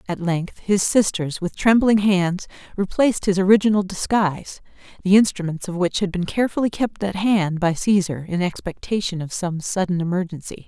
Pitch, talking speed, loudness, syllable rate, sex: 190 Hz, 165 wpm, -20 LUFS, 5.2 syllables/s, female